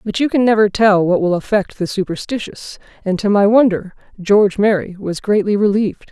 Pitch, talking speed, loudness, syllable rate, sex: 200 Hz, 185 wpm, -15 LUFS, 5.5 syllables/s, female